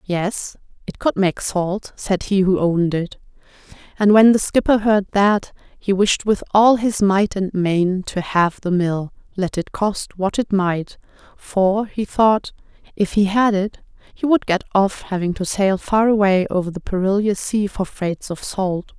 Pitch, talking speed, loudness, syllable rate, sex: 195 Hz, 185 wpm, -19 LUFS, 4.1 syllables/s, female